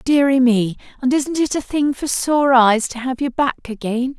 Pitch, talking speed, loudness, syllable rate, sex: 260 Hz, 215 wpm, -18 LUFS, 4.5 syllables/s, female